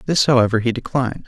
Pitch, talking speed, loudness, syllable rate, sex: 125 Hz, 190 wpm, -18 LUFS, 7.2 syllables/s, male